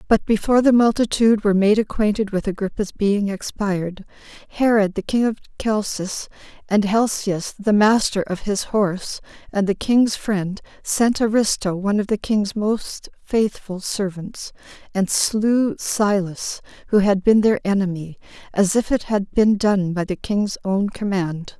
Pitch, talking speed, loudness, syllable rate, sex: 205 Hz, 155 wpm, -20 LUFS, 4.4 syllables/s, female